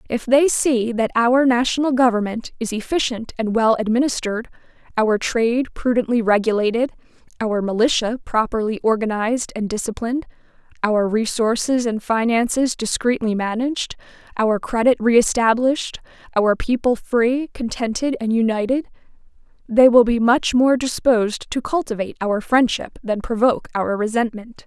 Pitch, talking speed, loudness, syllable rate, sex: 235 Hz, 125 wpm, -19 LUFS, 5.0 syllables/s, female